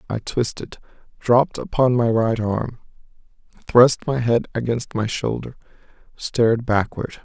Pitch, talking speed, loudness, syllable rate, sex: 115 Hz, 125 wpm, -20 LUFS, 4.3 syllables/s, male